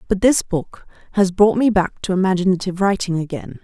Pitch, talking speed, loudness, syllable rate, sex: 190 Hz, 180 wpm, -18 LUFS, 5.7 syllables/s, female